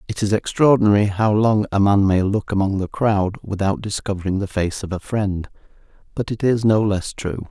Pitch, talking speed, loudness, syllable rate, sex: 105 Hz, 200 wpm, -19 LUFS, 5.2 syllables/s, male